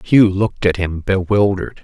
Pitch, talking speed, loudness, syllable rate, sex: 95 Hz, 165 wpm, -16 LUFS, 5.2 syllables/s, male